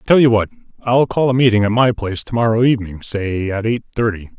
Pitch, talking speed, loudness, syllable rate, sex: 115 Hz, 220 wpm, -16 LUFS, 6.2 syllables/s, male